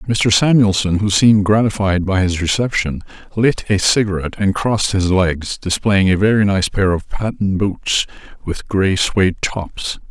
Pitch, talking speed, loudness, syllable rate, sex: 100 Hz, 160 wpm, -16 LUFS, 4.6 syllables/s, male